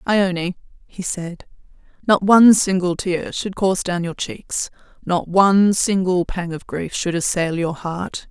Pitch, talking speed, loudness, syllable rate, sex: 185 Hz, 160 wpm, -19 LUFS, 4.0 syllables/s, female